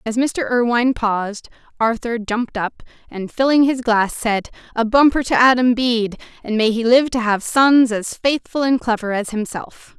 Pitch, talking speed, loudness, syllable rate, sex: 235 Hz, 180 wpm, -18 LUFS, 4.8 syllables/s, female